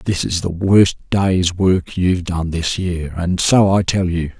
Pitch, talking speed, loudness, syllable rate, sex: 90 Hz, 205 wpm, -17 LUFS, 3.9 syllables/s, male